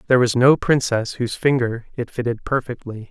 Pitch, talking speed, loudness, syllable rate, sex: 120 Hz, 175 wpm, -20 LUFS, 5.7 syllables/s, male